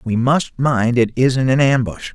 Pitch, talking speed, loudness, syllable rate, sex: 125 Hz, 195 wpm, -16 LUFS, 3.9 syllables/s, male